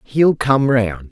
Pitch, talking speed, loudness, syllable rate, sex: 125 Hz, 160 wpm, -16 LUFS, 3.0 syllables/s, female